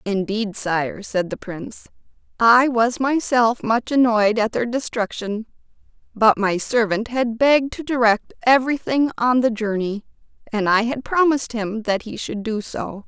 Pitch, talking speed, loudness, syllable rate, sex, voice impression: 230 Hz, 155 wpm, -20 LUFS, 4.4 syllables/s, female, very feminine, very adult-like, thin, tensed, slightly weak, bright, soft, clear, fluent, slightly cute, slightly intellectual, refreshing, sincere, slightly calm, slightly friendly, slightly reassuring, very unique, slightly elegant, wild, slightly sweet, lively, slightly kind, sharp, slightly modest, light